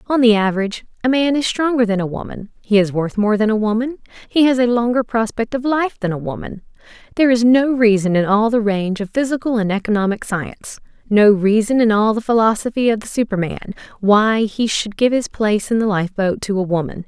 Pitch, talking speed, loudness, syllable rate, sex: 220 Hz, 220 wpm, -17 LUFS, 5.8 syllables/s, female